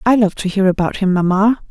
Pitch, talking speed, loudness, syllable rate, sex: 200 Hz, 245 wpm, -15 LUFS, 5.8 syllables/s, female